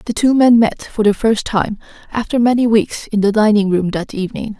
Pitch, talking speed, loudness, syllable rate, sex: 215 Hz, 220 wpm, -15 LUFS, 5.4 syllables/s, female